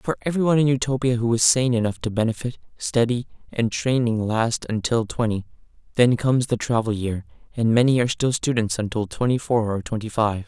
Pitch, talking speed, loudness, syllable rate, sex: 115 Hz, 185 wpm, -22 LUFS, 5.7 syllables/s, male